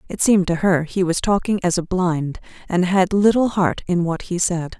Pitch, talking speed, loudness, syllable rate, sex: 180 Hz, 225 wpm, -19 LUFS, 4.9 syllables/s, female